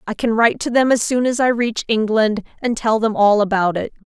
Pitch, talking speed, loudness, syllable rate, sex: 225 Hz, 250 wpm, -17 LUFS, 5.5 syllables/s, female